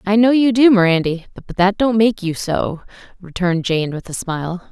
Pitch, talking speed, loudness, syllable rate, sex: 190 Hz, 205 wpm, -16 LUFS, 5.1 syllables/s, female